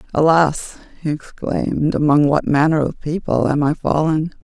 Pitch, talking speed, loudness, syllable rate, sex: 150 Hz, 150 wpm, -18 LUFS, 4.7 syllables/s, female